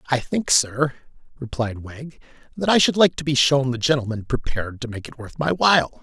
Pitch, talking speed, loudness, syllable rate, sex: 135 Hz, 210 wpm, -20 LUFS, 5.3 syllables/s, male